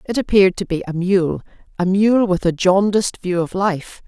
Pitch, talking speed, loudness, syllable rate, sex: 185 Hz, 190 wpm, -17 LUFS, 5.1 syllables/s, female